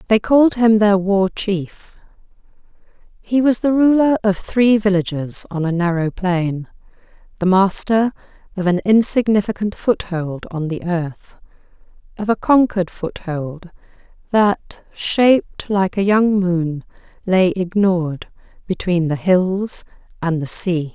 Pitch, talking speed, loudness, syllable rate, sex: 195 Hz, 125 wpm, -17 LUFS, 4.0 syllables/s, female